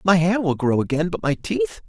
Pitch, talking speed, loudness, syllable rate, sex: 160 Hz, 255 wpm, -21 LUFS, 5.1 syllables/s, male